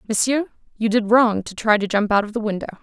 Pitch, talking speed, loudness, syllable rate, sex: 215 Hz, 255 wpm, -19 LUFS, 6.4 syllables/s, female